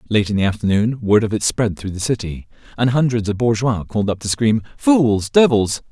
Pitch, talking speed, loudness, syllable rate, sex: 110 Hz, 215 wpm, -18 LUFS, 5.4 syllables/s, male